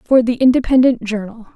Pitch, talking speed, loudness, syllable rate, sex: 235 Hz, 155 wpm, -15 LUFS, 5.6 syllables/s, female